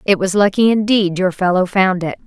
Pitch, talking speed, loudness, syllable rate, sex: 190 Hz, 210 wpm, -15 LUFS, 5.2 syllables/s, female